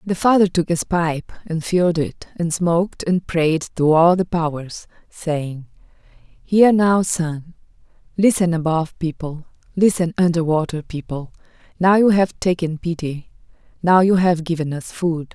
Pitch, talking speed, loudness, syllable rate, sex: 170 Hz, 145 wpm, -19 LUFS, 4.3 syllables/s, female